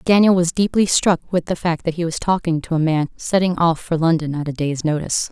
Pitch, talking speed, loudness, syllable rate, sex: 165 Hz, 250 wpm, -19 LUFS, 5.7 syllables/s, female